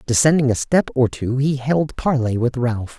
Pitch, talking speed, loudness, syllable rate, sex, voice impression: 130 Hz, 200 wpm, -19 LUFS, 4.6 syllables/s, male, masculine, adult-like, slightly relaxed, slightly weak, bright, soft, slightly muffled, intellectual, calm, friendly, slightly lively, kind, modest